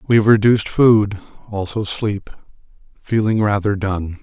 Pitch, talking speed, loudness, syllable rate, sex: 105 Hz, 130 wpm, -17 LUFS, 4.6 syllables/s, male